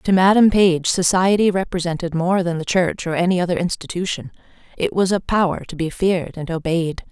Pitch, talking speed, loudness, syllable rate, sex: 180 Hz, 185 wpm, -19 LUFS, 5.5 syllables/s, female